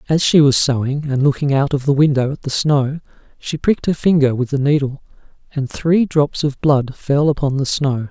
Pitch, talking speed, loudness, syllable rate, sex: 140 Hz, 215 wpm, -17 LUFS, 5.1 syllables/s, male